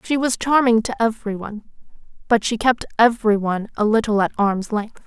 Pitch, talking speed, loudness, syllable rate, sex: 220 Hz, 190 wpm, -19 LUFS, 6.0 syllables/s, female